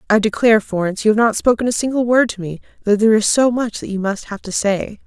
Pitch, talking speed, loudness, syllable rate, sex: 215 Hz, 270 wpm, -17 LUFS, 6.6 syllables/s, female